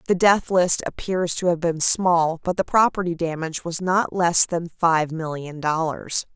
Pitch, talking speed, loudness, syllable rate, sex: 170 Hz, 180 wpm, -21 LUFS, 4.3 syllables/s, female